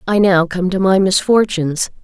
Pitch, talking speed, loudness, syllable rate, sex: 185 Hz, 175 wpm, -14 LUFS, 5.0 syllables/s, female